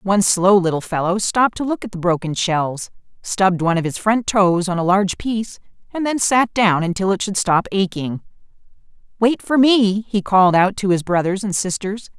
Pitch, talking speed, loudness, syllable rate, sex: 195 Hz, 200 wpm, -18 LUFS, 5.3 syllables/s, female